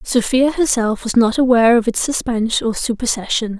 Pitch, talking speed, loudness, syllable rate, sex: 235 Hz, 165 wpm, -16 LUFS, 5.4 syllables/s, female